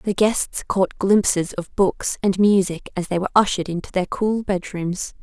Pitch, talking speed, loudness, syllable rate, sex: 195 Hz, 185 wpm, -21 LUFS, 4.6 syllables/s, female